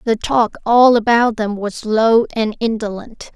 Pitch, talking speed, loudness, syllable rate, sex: 225 Hz, 160 wpm, -15 LUFS, 3.9 syllables/s, female